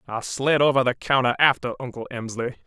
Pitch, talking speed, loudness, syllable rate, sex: 130 Hz, 180 wpm, -22 LUFS, 5.7 syllables/s, male